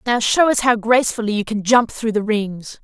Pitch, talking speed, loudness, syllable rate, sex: 225 Hz, 235 wpm, -17 LUFS, 5.2 syllables/s, female